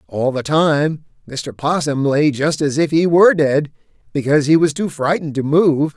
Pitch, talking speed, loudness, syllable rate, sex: 150 Hz, 190 wpm, -16 LUFS, 4.9 syllables/s, male